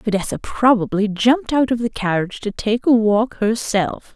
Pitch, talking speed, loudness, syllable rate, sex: 220 Hz, 175 wpm, -18 LUFS, 4.9 syllables/s, female